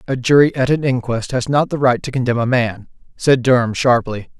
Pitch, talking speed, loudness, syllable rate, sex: 125 Hz, 220 wpm, -16 LUFS, 5.4 syllables/s, male